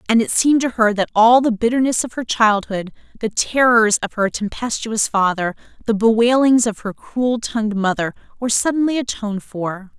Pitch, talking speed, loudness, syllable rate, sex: 225 Hz, 175 wpm, -18 LUFS, 5.2 syllables/s, female